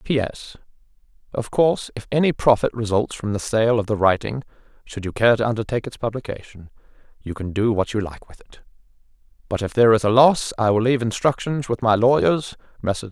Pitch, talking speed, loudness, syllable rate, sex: 115 Hz, 190 wpm, -20 LUFS, 5.8 syllables/s, male